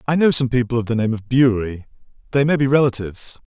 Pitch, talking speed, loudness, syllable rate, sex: 125 Hz, 205 wpm, -18 LUFS, 6.9 syllables/s, male